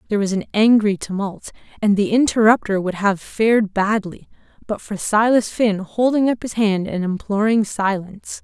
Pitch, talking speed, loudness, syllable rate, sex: 210 Hz, 165 wpm, -19 LUFS, 5.0 syllables/s, female